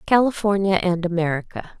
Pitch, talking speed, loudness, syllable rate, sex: 185 Hz, 100 wpm, -21 LUFS, 5.4 syllables/s, female